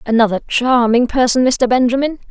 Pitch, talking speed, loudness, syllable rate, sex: 245 Hz, 130 wpm, -14 LUFS, 5.4 syllables/s, female